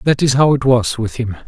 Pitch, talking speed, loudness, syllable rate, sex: 125 Hz, 285 wpm, -15 LUFS, 5.5 syllables/s, male